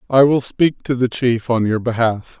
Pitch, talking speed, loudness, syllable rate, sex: 120 Hz, 225 wpm, -17 LUFS, 4.6 syllables/s, male